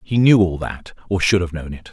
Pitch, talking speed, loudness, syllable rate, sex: 90 Hz, 280 wpm, -18 LUFS, 5.4 syllables/s, male